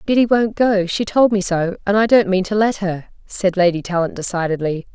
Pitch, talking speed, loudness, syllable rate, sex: 195 Hz, 220 wpm, -17 LUFS, 5.4 syllables/s, female